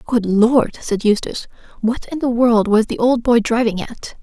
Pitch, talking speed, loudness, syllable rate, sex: 230 Hz, 200 wpm, -17 LUFS, 4.9 syllables/s, female